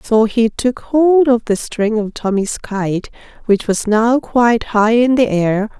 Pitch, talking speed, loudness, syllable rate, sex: 225 Hz, 185 wpm, -15 LUFS, 3.8 syllables/s, female